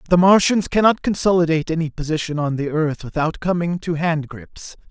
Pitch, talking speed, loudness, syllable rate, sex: 165 Hz, 170 wpm, -19 LUFS, 5.7 syllables/s, male